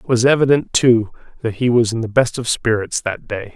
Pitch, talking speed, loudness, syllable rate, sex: 115 Hz, 235 wpm, -17 LUFS, 5.3 syllables/s, male